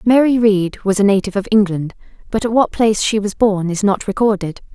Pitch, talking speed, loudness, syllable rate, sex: 205 Hz, 215 wpm, -16 LUFS, 5.8 syllables/s, female